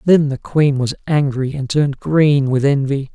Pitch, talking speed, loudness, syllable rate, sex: 140 Hz, 190 wpm, -16 LUFS, 4.4 syllables/s, male